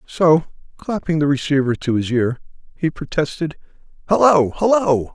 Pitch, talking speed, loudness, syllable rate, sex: 155 Hz, 130 wpm, -18 LUFS, 4.7 syllables/s, male